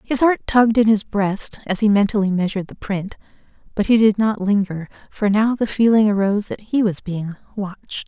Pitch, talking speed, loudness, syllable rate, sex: 210 Hz, 200 wpm, -19 LUFS, 5.3 syllables/s, female